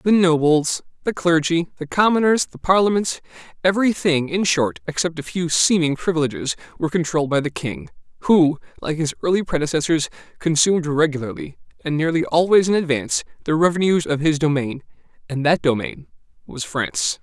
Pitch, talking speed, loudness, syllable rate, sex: 160 Hz, 150 wpm, -20 LUFS, 5.6 syllables/s, male